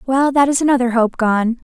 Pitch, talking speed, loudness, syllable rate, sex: 250 Hz, 210 wpm, -15 LUFS, 5.4 syllables/s, female